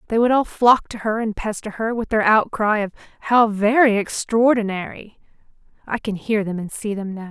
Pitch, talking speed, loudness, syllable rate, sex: 215 Hz, 195 wpm, -19 LUFS, 5.1 syllables/s, female